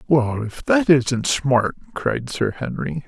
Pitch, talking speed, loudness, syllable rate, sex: 135 Hz, 155 wpm, -20 LUFS, 3.3 syllables/s, male